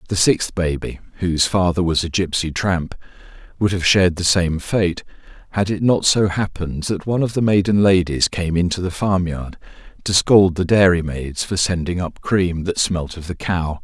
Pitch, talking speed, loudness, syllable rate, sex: 90 Hz, 185 wpm, -18 LUFS, 4.9 syllables/s, male